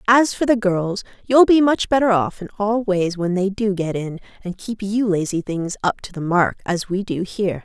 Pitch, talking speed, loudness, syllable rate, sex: 200 Hz, 235 wpm, -19 LUFS, 4.8 syllables/s, female